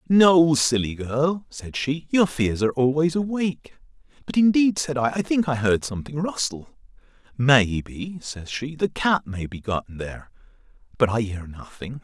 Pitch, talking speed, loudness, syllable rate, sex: 135 Hz, 160 wpm, -22 LUFS, 4.6 syllables/s, male